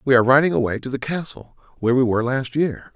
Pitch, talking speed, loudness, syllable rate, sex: 125 Hz, 245 wpm, -20 LUFS, 7.0 syllables/s, male